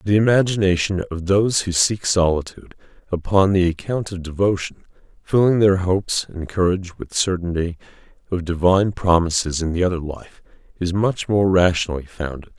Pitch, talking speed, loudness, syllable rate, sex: 90 Hz, 150 wpm, -19 LUFS, 5.5 syllables/s, male